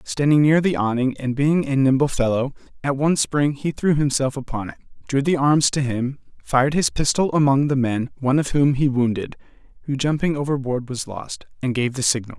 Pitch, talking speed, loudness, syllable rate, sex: 135 Hz, 205 wpm, -20 LUFS, 5.0 syllables/s, male